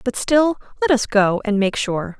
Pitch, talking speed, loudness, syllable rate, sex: 230 Hz, 220 wpm, -18 LUFS, 4.3 syllables/s, female